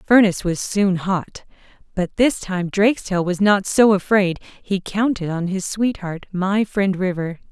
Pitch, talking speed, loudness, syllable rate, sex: 195 Hz, 170 wpm, -19 LUFS, 4.4 syllables/s, female